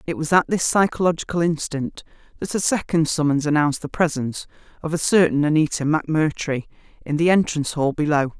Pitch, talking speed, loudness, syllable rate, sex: 155 Hz, 165 wpm, -21 LUFS, 7.1 syllables/s, female